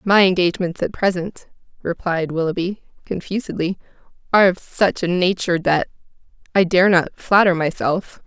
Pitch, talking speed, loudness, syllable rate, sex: 180 Hz, 115 wpm, -19 LUFS, 5.2 syllables/s, female